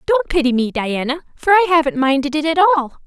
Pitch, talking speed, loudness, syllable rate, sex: 300 Hz, 215 wpm, -16 LUFS, 6.4 syllables/s, female